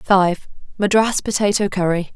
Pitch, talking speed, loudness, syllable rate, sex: 195 Hz, 85 wpm, -18 LUFS, 4.6 syllables/s, female